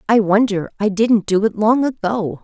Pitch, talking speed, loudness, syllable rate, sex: 210 Hz, 195 wpm, -17 LUFS, 4.6 syllables/s, female